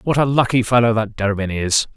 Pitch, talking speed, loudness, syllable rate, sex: 115 Hz, 215 wpm, -17 LUFS, 6.0 syllables/s, male